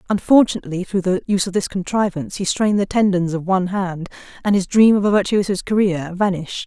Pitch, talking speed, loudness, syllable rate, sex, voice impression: 190 Hz, 200 wpm, -18 LUFS, 6.5 syllables/s, female, feminine, adult-like, slightly cool, calm